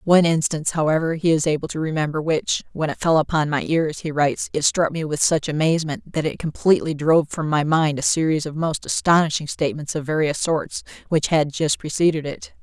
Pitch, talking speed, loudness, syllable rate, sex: 155 Hz, 210 wpm, -21 LUFS, 5.8 syllables/s, female